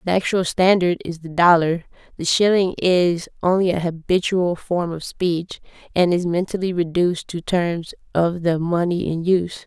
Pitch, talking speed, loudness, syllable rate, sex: 175 Hz, 160 wpm, -20 LUFS, 4.7 syllables/s, female